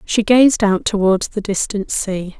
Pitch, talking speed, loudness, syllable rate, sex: 205 Hz, 175 wpm, -16 LUFS, 4.0 syllables/s, female